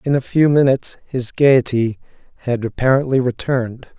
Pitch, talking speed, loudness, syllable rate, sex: 130 Hz, 135 wpm, -17 LUFS, 5.1 syllables/s, male